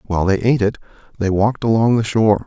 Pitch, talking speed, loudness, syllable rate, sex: 105 Hz, 220 wpm, -17 LUFS, 7.4 syllables/s, male